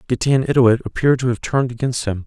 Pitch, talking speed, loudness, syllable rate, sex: 125 Hz, 185 wpm, -18 LUFS, 7.1 syllables/s, male